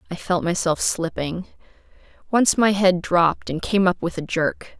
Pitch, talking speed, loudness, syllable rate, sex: 180 Hz, 175 wpm, -21 LUFS, 4.6 syllables/s, female